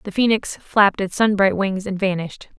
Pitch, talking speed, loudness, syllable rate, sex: 200 Hz, 185 wpm, -19 LUFS, 5.4 syllables/s, female